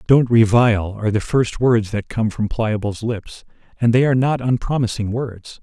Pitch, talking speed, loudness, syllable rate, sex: 115 Hz, 180 wpm, -18 LUFS, 4.8 syllables/s, male